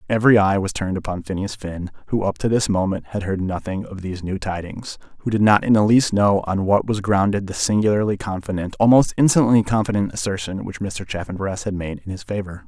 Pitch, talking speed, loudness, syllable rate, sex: 100 Hz, 205 wpm, -20 LUFS, 6.0 syllables/s, male